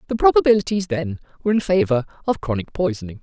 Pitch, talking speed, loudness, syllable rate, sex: 170 Hz, 165 wpm, -20 LUFS, 7.0 syllables/s, male